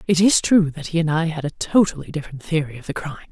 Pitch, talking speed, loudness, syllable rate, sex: 160 Hz, 270 wpm, -20 LUFS, 6.9 syllables/s, female